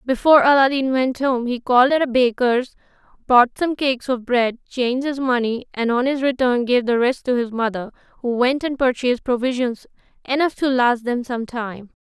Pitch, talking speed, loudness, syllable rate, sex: 250 Hz, 190 wpm, -19 LUFS, 5.2 syllables/s, female